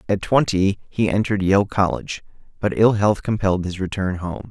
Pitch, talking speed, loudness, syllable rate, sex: 100 Hz, 175 wpm, -20 LUFS, 5.4 syllables/s, male